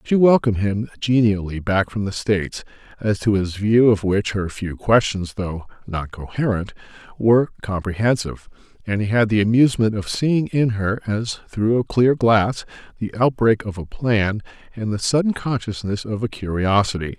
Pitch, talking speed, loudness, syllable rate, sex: 105 Hz, 170 wpm, -20 LUFS, 4.9 syllables/s, male